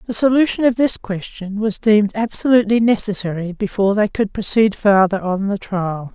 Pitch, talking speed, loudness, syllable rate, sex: 210 Hz, 165 wpm, -17 LUFS, 5.4 syllables/s, female